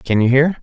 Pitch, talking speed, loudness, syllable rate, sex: 135 Hz, 285 wpm, -14 LUFS, 5.5 syllables/s, male